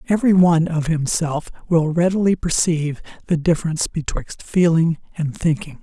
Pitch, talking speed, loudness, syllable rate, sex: 165 Hz, 135 wpm, -19 LUFS, 5.4 syllables/s, male